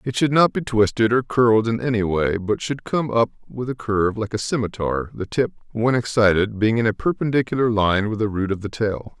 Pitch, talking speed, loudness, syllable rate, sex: 115 Hz, 230 wpm, -21 LUFS, 5.5 syllables/s, male